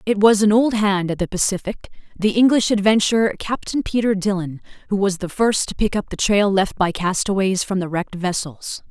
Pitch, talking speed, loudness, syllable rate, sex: 200 Hz, 200 wpm, -19 LUFS, 5.4 syllables/s, female